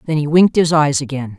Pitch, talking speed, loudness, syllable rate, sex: 145 Hz, 260 wpm, -15 LUFS, 6.5 syllables/s, female